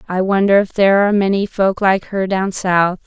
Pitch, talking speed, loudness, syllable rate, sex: 195 Hz, 215 wpm, -15 LUFS, 5.2 syllables/s, female